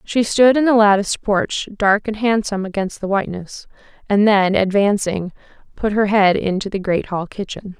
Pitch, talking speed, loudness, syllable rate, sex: 205 Hz, 175 wpm, -17 LUFS, 5.0 syllables/s, female